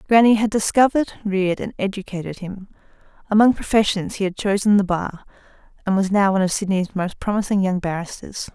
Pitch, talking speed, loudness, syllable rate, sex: 200 Hz, 170 wpm, -20 LUFS, 6.0 syllables/s, female